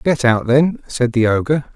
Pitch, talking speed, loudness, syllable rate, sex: 135 Hz, 205 wpm, -16 LUFS, 4.5 syllables/s, male